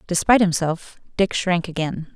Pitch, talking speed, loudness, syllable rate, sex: 175 Hz, 140 wpm, -20 LUFS, 5.0 syllables/s, female